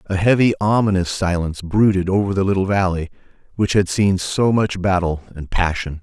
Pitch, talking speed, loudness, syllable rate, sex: 95 Hz, 170 wpm, -18 LUFS, 5.5 syllables/s, male